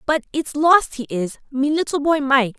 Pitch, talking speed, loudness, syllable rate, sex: 280 Hz, 210 wpm, -19 LUFS, 4.6 syllables/s, female